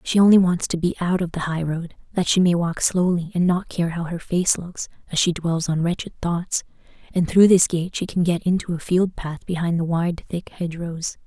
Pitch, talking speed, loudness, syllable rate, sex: 175 Hz, 235 wpm, -21 LUFS, 5.1 syllables/s, female